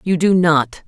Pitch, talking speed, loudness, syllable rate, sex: 165 Hz, 205 wpm, -15 LUFS, 3.9 syllables/s, female